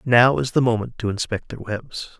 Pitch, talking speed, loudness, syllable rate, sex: 115 Hz, 220 wpm, -21 LUFS, 5.1 syllables/s, male